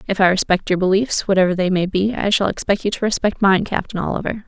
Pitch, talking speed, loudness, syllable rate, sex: 195 Hz, 240 wpm, -18 LUFS, 6.3 syllables/s, female